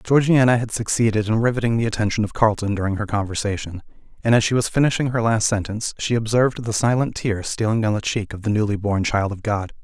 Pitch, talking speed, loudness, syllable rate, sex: 110 Hz, 220 wpm, -20 LUFS, 6.3 syllables/s, male